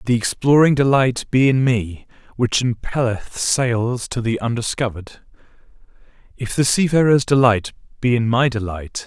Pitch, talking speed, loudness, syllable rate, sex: 120 Hz, 140 wpm, -18 LUFS, 4.7 syllables/s, male